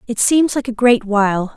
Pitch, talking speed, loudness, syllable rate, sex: 230 Hz, 230 wpm, -15 LUFS, 5.0 syllables/s, female